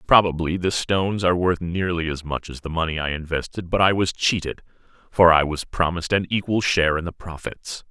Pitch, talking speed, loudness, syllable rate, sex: 85 Hz, 205 wpm, -22 LUFS, 5.7 syllables/s, male